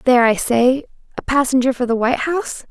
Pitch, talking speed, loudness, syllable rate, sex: 255 Hz, 155 wpm, -17 LUFS, 6.4 syllables/s, female